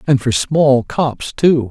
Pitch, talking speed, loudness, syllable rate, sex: 135 Hz, 175 wpm, -15 LUFS, 3.2 syllables/s, male